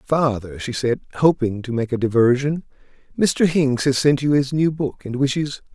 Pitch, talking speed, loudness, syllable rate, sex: 135 Hz, 190 wpm, -20 LUFS, 4.8 syllables/s, male